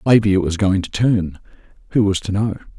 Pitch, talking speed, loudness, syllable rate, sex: 100 Hz, 195 wpm, -18 LUFS, 5.7 syllables/s, male